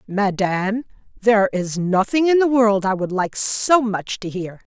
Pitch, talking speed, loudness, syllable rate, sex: 210 Hz, 175 wpm, -19 LUFS, 4.3 syllables/s, female